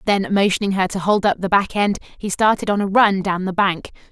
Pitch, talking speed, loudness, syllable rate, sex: 195 Hz, 250 wpm, -18 LUFS, 5.8 syllables/s, female